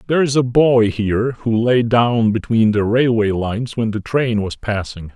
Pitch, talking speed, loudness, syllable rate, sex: 115 Hz, 185 wpm, -17 LUFS, 4.4 syllables/s, male